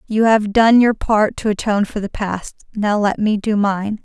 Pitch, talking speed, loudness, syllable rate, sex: 210 Hz, 225 wpm, -16 LUFS, 4.6 syllables/s, female